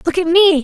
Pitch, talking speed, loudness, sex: 345 Hz, 285 wpm, -13 LUFS, female